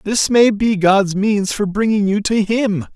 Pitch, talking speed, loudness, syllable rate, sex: 205 Hz, 205 wpm, -16 LUFS, 4.0 syllables/s, male